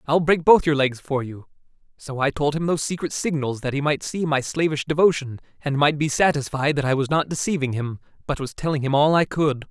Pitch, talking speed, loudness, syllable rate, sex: 145 Hz, 235 wpm, -22 LUFS, 5.7 syllables/s, male